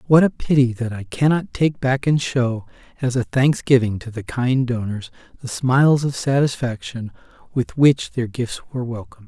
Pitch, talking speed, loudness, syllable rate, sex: 125 Hz, 175 wpm, -20 LUFS, 4.9 syllables/s, male